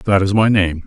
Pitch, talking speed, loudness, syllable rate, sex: 100 Hz, 280 wpm, -15 LUFS, 4.8 syllables/s, male